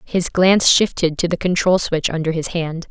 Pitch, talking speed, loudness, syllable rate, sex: 170 Hz, 205 wpm, -17 LUFS, 5.1 syllables/s, female